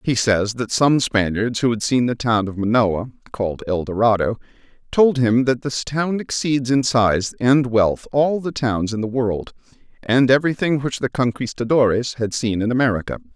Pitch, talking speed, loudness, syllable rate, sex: 120 Hz, 180 wpm, -19 LUFS, 4.8 syllables/s, male